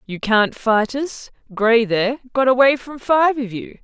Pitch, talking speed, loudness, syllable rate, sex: 240 Hz, 170 wpm, -18 LUFS, 4.3 syllables/s, female